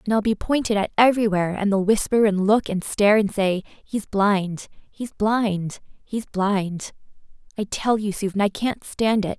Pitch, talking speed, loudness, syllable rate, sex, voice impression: 205 Hz, 175 wpm, -22 LUFS, 4.8 syllables/s, female, very feminine, very young, very thin, slightly tensed, slightly weak, bright, soft, clear, fluent, slightly raspy, very cute, intellectual, very refreshing, sincere, calm, very friendly, very reassuring, unique, very elegant, slightly wild, sweet, very lively, very kind, sharp, slightly modest, light